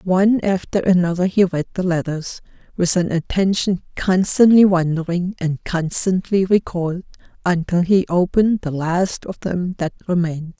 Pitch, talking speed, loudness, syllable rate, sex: 180 Hz, 135 wpm, -18 LUFS, 4.7 syllables/s, female